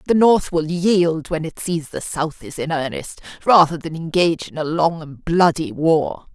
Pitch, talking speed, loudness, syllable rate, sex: 165 Hz, 200 wpm, -19 LUFS, 4.4 syllables/s, female